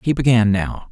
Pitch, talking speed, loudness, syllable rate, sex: 110 Hz, 195 wpm, -17 LUFS, 5.3 syllables/s, male